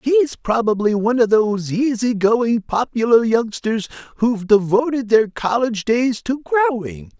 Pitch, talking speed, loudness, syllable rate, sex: 230 Hz, 135 wpm, -18 LUFS, 4.6 syllables/s, male